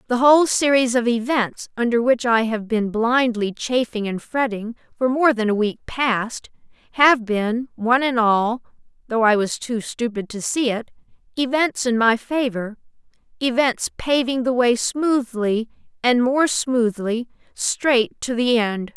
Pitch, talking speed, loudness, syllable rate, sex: 240 Hz, 150 wpm, -20 LUFS, 4.1 syllables/s, female